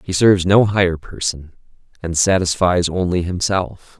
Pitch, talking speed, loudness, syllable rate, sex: 90 Hz, 135 wpm, -17 LUFS, 4.7 syllables/s, male